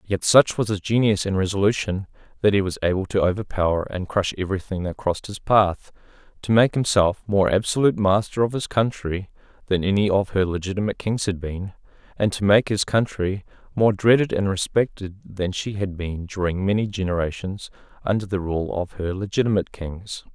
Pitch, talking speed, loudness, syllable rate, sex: 100 Hz, 175 wpm, -22 LUFS, 5.5 syllables/s, male